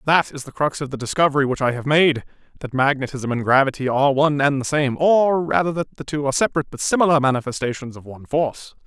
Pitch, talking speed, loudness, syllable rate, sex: 140 Hz, 225 wpm, -20 LUFS, 6.7 syllables/s, male